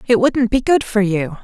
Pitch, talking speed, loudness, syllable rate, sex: 220 Hz, 250 wpm, -16 LUFS, 4.8 syllables/s, female